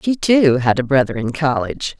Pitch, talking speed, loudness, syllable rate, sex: 145 Hz, 210 wpm, -16 LUFS, 5.3 syllables/s, female